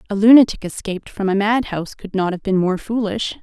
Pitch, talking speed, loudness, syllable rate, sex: 205 Hz, 210 wpm, -18 LUFS, 5.9 syllables/s, female